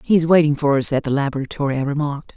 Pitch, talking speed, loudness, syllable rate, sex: 145 Hz, 230 wpm, -18 LUFS, 7.1 syllables/s, female